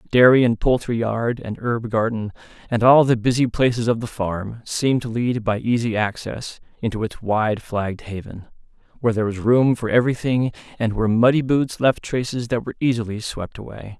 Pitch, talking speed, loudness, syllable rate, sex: 115 Hz, 185 wpm, -20 LUFS, 5.4 syllables/s, male